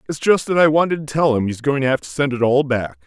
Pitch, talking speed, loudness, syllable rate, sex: 135 Hz, 335 wpm, -18 LUFS, 6.4 syllables/s, male